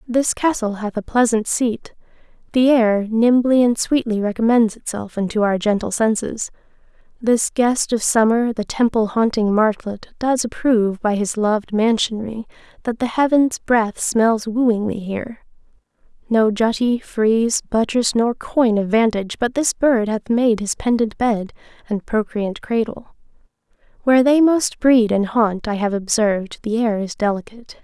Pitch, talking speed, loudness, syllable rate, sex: 225 Hz, 150 wpm, -18 LUFS, 4.5 syllables/s, female